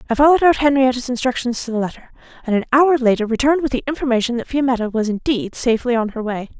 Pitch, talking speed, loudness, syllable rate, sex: 250 Hz, 220 wpm, -18 LUFS, 7.1 syllables/s, female